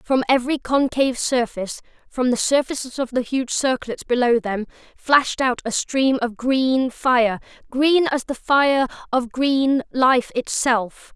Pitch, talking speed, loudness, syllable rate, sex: 255 Hz, 145 wpm, -20 LUFS, 4.1 syllables/s, female